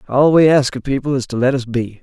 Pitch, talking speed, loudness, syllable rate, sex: 130 Hz, 295 wpm, -15 LUFS, 6.0 syllables/s, male